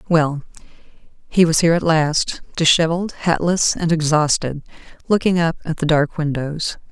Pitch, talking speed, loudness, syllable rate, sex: 160 Hz, 140 wpm, -18 LUFS, 4.3 syllables/s, female